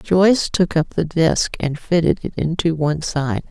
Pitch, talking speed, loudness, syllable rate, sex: 160 Hz, 190 wpm, -19 LUFS, 4.5 syllables/s, female